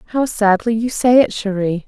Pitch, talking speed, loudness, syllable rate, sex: 220 Hz, 190 wpm, -16 LUFS, 4.4 syllables/s, female